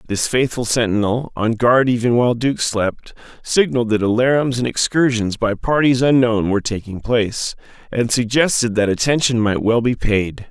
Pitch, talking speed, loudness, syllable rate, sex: 120 Hz, 160 wpm, -17 LUFS, 5.0 syllables/s, male